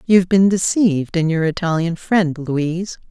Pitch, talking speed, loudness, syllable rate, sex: 175 Hz, 155 wpm, -17 LUFS, 4.8 syllables/s, female